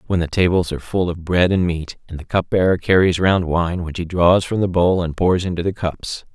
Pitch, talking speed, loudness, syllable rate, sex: 85 Hz, 255 wpm, -18 LUFS, 5.3 syllables/s, male